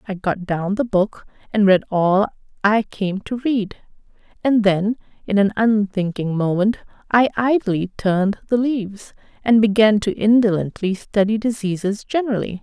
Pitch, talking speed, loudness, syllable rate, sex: 210 Hz, 145 wpm, -19 LUFS, 4.6 syllables/s, female